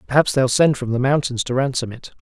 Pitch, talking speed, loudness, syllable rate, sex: 130 Hz, 240 wpm, -19 LUFS, 6.0 syllables/s, male